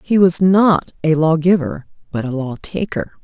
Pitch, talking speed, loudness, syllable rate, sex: 165 Hz, 185 wpm, -16 LUFS, 4.4 syllables/s, female